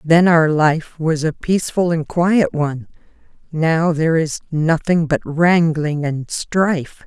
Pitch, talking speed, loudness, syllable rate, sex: 160 Hz, 145 wpm, -17 LUFS, 3.9 syllables/s, female